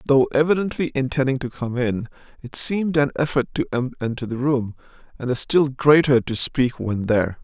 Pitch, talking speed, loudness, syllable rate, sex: 135 Hz, 180 wpm, -21 LUFS, 5.1 syllables/s, male